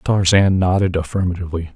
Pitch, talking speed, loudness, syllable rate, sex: 90 Hz, 100 wpm, -17 LUFS, 6.2 syllables/s, male